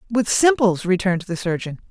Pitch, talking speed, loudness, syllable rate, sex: 200 Hz, 155 wpm, -19 LUFS, 6.0 syllables/s, female